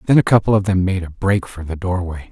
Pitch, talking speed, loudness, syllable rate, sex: 95 Hz, 285 wpm, -18 LUFS, 6.1 syllables/s, male